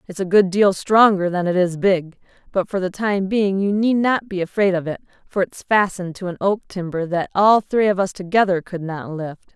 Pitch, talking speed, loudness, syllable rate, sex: 190 Hz, 230 wpm, -19 LUFS, 5.1 syllables/s, female